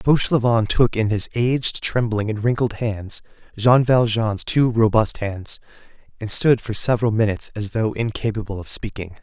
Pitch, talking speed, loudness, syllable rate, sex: 110 Hz, 155 wpm, -20 LUFS, 4.9 syllables/s, male